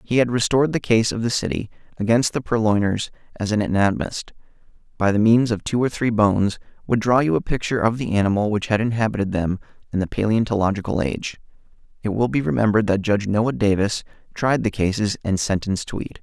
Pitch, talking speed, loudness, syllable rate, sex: 105 Hz, 190 wpm, -21 LUFS, 6.2 syllables/s, male